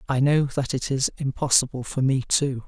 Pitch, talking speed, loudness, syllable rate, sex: 135 Hz, 200 wpm, -23 LUFS, 5.0 syllables/s, male